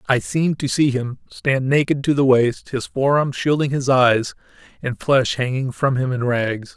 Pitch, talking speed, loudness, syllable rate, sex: 130 Hz, 195 wpm, -19 LUFS, 4.4 syllables/s, male